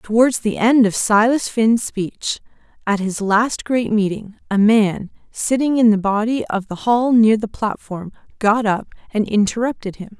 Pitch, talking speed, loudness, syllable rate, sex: 220 Hz, 170 wpm, -18 LUFS, 4.3 syllables/s, female